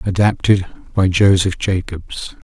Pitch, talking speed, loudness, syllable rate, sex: 95 Hz, 95 wpm, -16 LUFS, 3.9 syllables/s, male